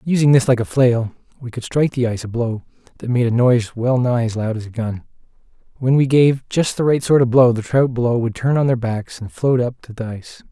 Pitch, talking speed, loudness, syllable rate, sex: 125 Hz, 265 wpm, -18 LUFS, 5.8 syllables/s, male